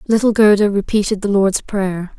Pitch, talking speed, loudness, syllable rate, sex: 200 Hz, 165 wpm, -15 LUFS, 4.9 syllables/s, female